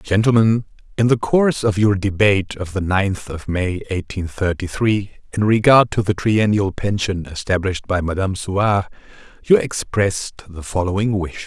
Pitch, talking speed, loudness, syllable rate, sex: 100 Hz, 150 wpm, -19 LUFS, 5.0 syllables/s, male